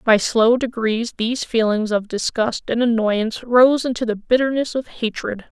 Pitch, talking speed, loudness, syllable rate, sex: 230 Hz, 160 wpm, -19 LUFS, 4.7 syllables/s, female